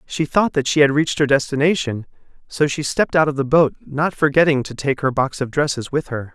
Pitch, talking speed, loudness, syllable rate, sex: 140 Hz, 235 wpm, -18 LUFS, 5.8 syllables/s, male